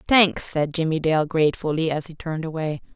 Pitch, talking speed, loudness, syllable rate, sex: 160 Hz, 185 wpm, -22 LUFS, 5.5 syllables/s, female